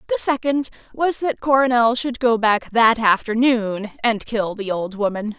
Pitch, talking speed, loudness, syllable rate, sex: 235 Hz, 165 wpm, -19 LUFS, 4.4 syllables/s, female